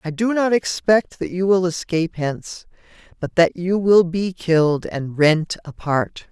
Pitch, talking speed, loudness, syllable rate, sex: 175 Hz, 170 wpm, -19 LUFS, 4.3 syllables/s, female